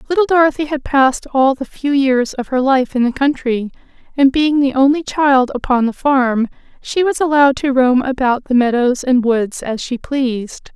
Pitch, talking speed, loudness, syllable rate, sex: 265 Hz, 195 wpm, -15 LUFS, 4.9 syllables/s, female